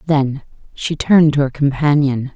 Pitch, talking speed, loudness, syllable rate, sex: 140 Hz, 155 wpm, -16 LUFS, 4.8 syllables/s, female